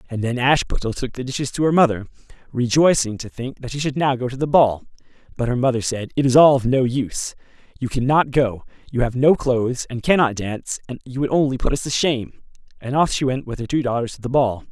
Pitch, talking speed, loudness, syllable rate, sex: 130 Hz, 240 wpm, -20 LUFS, 6.0 syllables/s, male